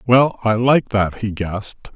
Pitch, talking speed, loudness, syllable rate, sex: 110 Hz, 185 wpm, -18 LUFS, 4.0 syllables/s, male